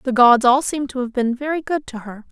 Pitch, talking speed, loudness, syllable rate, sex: 255 Hz, 285 wpm, -18 LUFS, 6.0 syllables/s, female